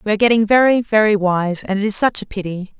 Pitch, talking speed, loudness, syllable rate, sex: 210 Hz, 260 wpm, -16 LUFS, 6.3 syllables/s, female